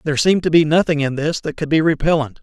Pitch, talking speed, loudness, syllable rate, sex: 155 Hz, 275 wpm, -17 LUFS, 6.9 syllables/s, male